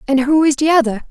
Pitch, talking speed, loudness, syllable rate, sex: 280 Hz, 270 wpm, -14 LUFS, 6.4 syllables/s, female